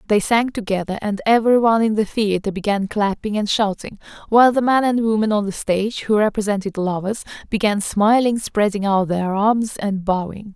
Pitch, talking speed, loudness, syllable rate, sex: 210 Hz, 170 wpm, -19 LUFS, 5.2 syllables/s, female